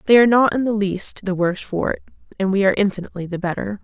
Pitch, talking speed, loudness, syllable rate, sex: 200 Hz, 250 wpm, -19 LUFS, 7.4 syllables/s, female